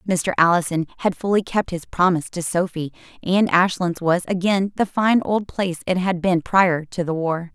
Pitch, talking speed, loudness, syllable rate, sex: 180 Hz, 190 wpm, -20 LUFS, 5.0 syllables/s, female